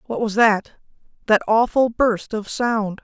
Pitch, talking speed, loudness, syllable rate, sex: 220 Hz, 140 wpm, -19 LUFS, 3.9 syllables/s, female